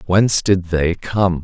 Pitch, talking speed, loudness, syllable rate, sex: 90 Hz, 165 wpm, -17 LUFS, 3.9 syllables/s, male